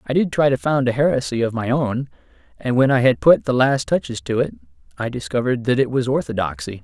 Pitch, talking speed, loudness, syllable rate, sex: 125 Hz, 230 wpm, -19 LUFS, 6.1 syllables/s, male